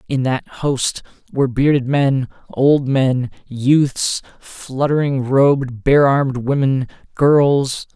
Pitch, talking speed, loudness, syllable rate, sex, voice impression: 135 Hz, 115 wpm, -17 LUFS, 3.3 syllables/s, male, masculine, adult-like, tensed, bright, clear, fluent, intellectual, friendly, reassuring, lively, kind